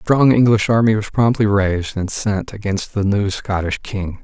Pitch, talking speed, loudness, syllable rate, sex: 105 Hz, 200 wpm, -17 LUFS, 4.8 syllables/s, male